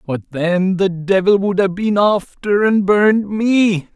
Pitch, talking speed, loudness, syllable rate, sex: 195 Hz, 165 wpm, -15 LUFS, 3.7 syllables/s, male